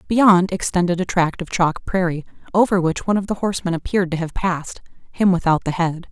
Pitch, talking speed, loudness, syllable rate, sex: 180 Hz, 195 wpm, -19 LUFS, 6.0 syllables/s, female